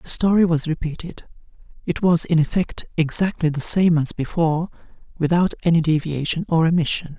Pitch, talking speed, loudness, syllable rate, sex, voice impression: 165 Hz, 150 wpm, -20 LUFS, 5.4 syllables/s, male, masculine, slightly gender-neutral, slightly young, slightly adult-like, slightly thin, relaxed, slightly weak, slightly bright, slightly soft, slightly clear, fluent, slightly raspy, slightly cool, intellectual, slightly refreshing, very sincere, slightly calm, slightly friendly, reassuring, unique, slightly elegant, sweet, very kind, modest, slightly light